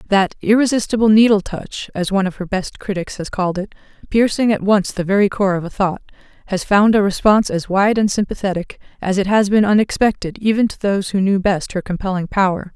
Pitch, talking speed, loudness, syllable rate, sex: 200 Hz, 205 wpm, -17 LUFS, 5.9 syllables/s, female